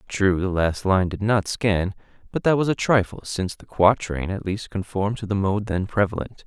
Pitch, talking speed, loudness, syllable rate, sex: 100 Hz, 215 wpm, -23 LUFS, 5.1 syllables/s, male